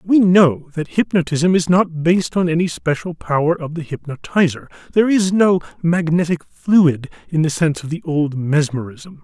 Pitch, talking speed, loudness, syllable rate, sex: 165 Hz, 170 wpm, -17 LUFS, 4.9 syllables/s, male